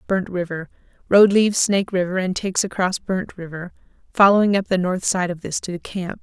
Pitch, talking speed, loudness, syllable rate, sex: 185 Hz, 195 wpm, -20 LUFS, 5.7 syllables/s, female